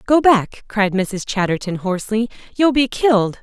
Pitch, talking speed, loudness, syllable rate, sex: 215 Hz, 160 wpm, -18 LUFS, 4.8 syllables/s, female